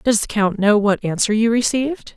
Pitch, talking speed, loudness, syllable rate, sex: 220 Hz, 220 wpm, -18 LUFS, 5.4 syllables/s, female